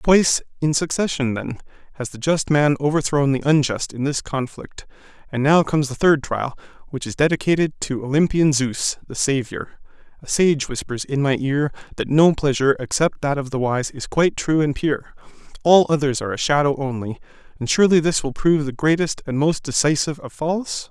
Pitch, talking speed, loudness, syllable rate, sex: 145 Hz, 185 wpm, -20 LUFS, 5.4 syllables/s, male